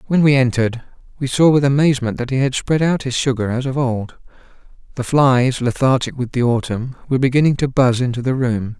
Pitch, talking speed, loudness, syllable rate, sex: 130 Hz, 205 wpm, -17 LUFS, 5.8 syllables/s, male